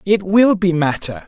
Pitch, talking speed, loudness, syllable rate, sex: 180 Hz, 190 wpm, -15 LUFS, 4.3 syllables/s, male